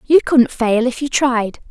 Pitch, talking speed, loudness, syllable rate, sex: 250 Hz, 210 wpm, -16 LUFS, 4.1 syllables/s, female